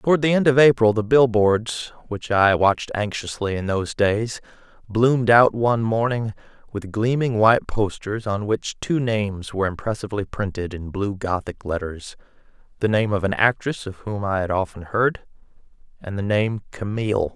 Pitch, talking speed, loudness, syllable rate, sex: 105 Hz, 165 wpm, -21 LUFS, 5.0 syllables/s, male